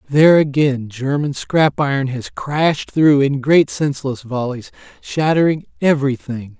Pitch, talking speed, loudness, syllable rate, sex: 140 Hz, 125 wpm, -17 LUFS, 4.5 syllables/s, male